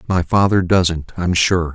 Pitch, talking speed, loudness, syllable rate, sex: 90 Hz, 170 wpm, -16 LUFS, 3.8 syllables/s, male